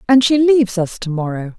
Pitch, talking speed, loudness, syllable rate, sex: 215 Hz, 225 wpm, -15 LUFS, 5.6 syllables/s, female